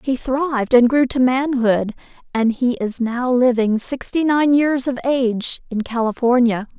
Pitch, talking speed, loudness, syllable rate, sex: 250 Hz, 160 wpm, -18 LUFS, 4.3 syllables/s, female